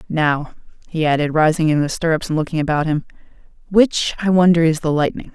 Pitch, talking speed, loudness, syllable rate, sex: 160 Hz, 190 wpm, -17 LUFS, 5.9 syllables/s, male